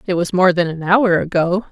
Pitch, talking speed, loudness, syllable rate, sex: 180 Hz, 245 wpm, -16 LUFS, 5.2 syllables/s, female